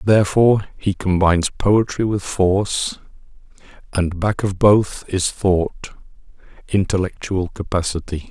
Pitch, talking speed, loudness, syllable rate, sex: 95 Hz, 95 wpm, -19 LUFS, 4.3 syllables/s, male